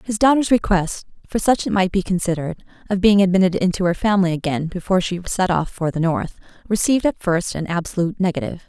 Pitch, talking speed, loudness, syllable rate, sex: 185 Hz, 200 wpm, -19 LUFS, 6.5 syllables/s, female